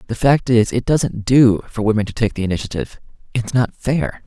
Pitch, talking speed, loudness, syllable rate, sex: 115 Hz, 195 wpm, -18 LUFS, 5.4 syllables/s, male